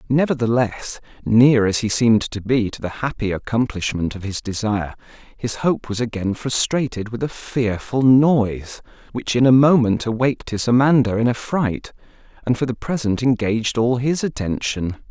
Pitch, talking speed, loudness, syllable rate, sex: 120 Hz, 165 wpm, -19 LUFS, 4.9 syllables/s, male